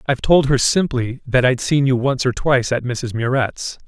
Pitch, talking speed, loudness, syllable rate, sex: 130 Hz, 215 wpm, -18 LUFS, 4.9 syllables/s, male